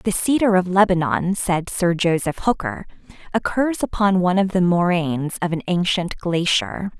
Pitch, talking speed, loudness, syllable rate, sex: 180 Hz, 155 wpm, -20 LUFS, 4.7 syllables/s, female